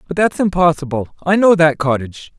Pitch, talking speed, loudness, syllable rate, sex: 165 Hz, 150 wpm, -15 LUFS, 5.8 syllables/s, male